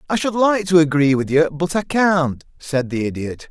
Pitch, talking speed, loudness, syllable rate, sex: 160 Hz, 220 wpm, -18 LUFS, 4.7 syllables/s, male